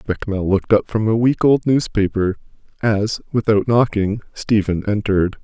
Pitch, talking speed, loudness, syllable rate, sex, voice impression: 105 Hz, 145 wpm, -18 LUFS, 5.1 syllables/s, male, very masculine, very adult-like, middle-aged, very thick, slightly relaxed, slightly powerful, weak, bright, slightly soft, slightly clear, fluent, slightly raspy, slightly cool, slightly intellectual, refreshing, sincere, calm, very mature, friendly, reassuring, elegant, slightly lively, kind